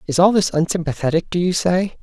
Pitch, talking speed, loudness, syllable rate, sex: 175 Hz, 210 wpm, -18 LUFS, 6.0 syllables/s, male